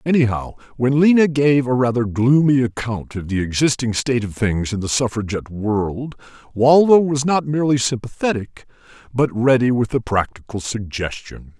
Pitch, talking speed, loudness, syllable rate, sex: 120 Hz, 150 wpm, -18 LUFS, 5.0 syllables/s, male